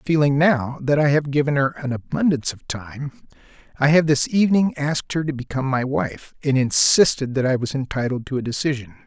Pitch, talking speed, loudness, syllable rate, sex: 140 Hz, 190 wpm, -20 LUFS, 5.7 syllables/s, male